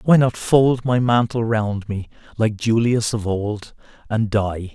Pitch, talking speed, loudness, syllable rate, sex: 110 Hz, 165 wpm, -20 LUFS, 3.8 syllables/s, male